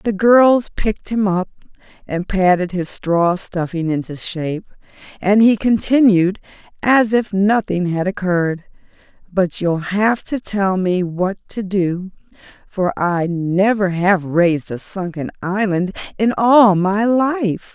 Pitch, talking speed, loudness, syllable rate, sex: 190 Hz, 140 wpm, -17 LUFS, 3.8 syllables/s, female